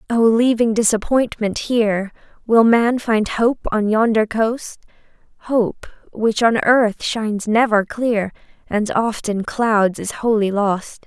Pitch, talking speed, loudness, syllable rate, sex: 220 Hz, 135 wpm, -18 LUFS, 3.7 syllables/s, female